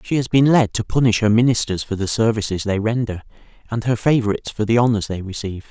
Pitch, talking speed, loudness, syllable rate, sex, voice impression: 110 Hz, 220 wpm, -19 LUFS, 6.5 syllables/s, male, masculine, adult-like, tensed, powerful, hard, clear, fluent, intellectual, friendly, unique, wild, lively